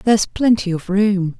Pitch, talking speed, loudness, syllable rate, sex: 200 Hz, 175 wpm, -17 LUFS, 4.7 syllables/s, female